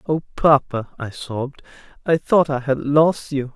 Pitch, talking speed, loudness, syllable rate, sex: 140 Hz, 170 wpm, -20 LUFS, 4.2 syllables/s, male